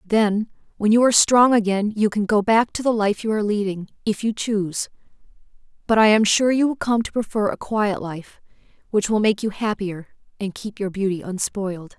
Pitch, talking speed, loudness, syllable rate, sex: 210 Hz, 205 wpm, -20 LUFS, 5.2 syllables/s, female